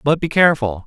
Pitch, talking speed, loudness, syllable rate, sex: 140 Hz, 210 wpm, -16 LUFS, 6.5 syllables/s, male